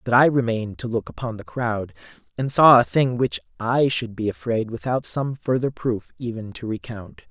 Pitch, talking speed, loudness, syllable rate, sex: 120 Hz, 195 wpm, -22 LUFS, 5.0 syllables/s, male